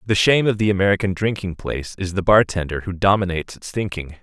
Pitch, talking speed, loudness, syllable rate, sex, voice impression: 95 Hz, 215 wpm, -20 LUFS, 6.6 syllables/s, male, masculine, very adult-like, fluent, intellectual, elegant, sweet